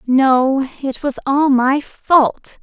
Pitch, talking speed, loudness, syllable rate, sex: 270 Hz, 135 wpm, -16 LUFS, 2.7 syllables/s, female